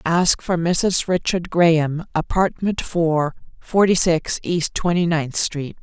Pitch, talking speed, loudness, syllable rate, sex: 170 Hz, 135 wpm, -19 LUFS, 3.6 syllables/s, female